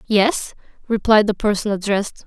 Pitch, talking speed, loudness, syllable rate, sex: 210 Hz, 130 wpm, -18 LUFS, 5.1 syllables/s, female